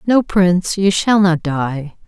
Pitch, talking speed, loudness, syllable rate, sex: 180 Hz, 175 wpm, -15 LUFS, 3.8 syllables/s, female